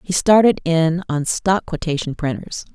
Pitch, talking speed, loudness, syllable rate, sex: 165 Hz, 155 wpm, -18 LUFS, 4.4 syllables/s, female